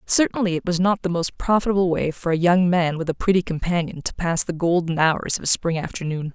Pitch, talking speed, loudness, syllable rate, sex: 175 Hz, 235 wpm, -21 LUFS, 5.8 syllables/s, female